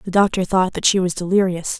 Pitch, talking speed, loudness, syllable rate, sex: 185 Hz, 235 wpm, -18 LUFS, 5.7 syllables/s, female